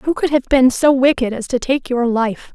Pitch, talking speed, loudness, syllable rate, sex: 255 Hz, 260 wpm, -16 LUFS, 4.9 syllables/s, female